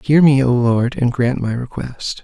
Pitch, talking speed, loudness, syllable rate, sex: 125 Hz, 215 wpm, -16 LUFS, 4.1 syllables/s, male